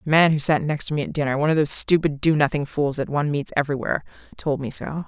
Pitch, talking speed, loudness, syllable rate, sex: 150 Hz, 235 wpm, -21 LUFS, 7.0 syllables/s, female